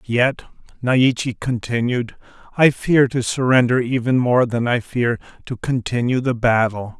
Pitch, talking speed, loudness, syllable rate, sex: 120 Hz, 135 wpm, -19 LUFS, 4.3 syllables/s, male